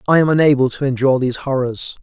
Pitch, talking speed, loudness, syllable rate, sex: 135 Hz, 205 wpm, -16 LUFS, 7.1 syllables/s, male